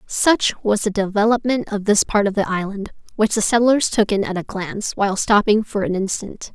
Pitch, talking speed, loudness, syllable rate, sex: 210 Hz, 210 wpm, -19 LUFS, 5.3 syllables/s, female